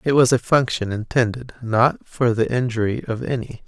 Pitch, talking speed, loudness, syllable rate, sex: 120 Hz, 180 wpm, -20 LUFS, 4.9 syllables/s, male